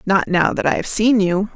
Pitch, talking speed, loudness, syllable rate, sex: 195 Hz, 270 wpm, -17 LUFS, 4.9 syllables/s, female